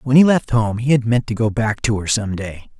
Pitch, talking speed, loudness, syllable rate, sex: 115 Hz, 300 wpm, -18 LUFS, 5.4 syllables/s, male